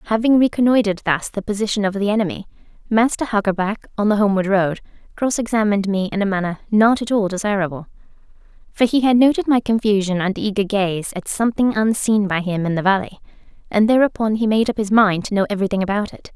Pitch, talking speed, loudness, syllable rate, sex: 210 Hz, 195 wpm, -18 LUFS, 6.4 syllables/s, female